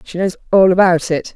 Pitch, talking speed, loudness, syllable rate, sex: 180 Hz, 220 wpm, -14 LUFS, 5.4 syllables/s, female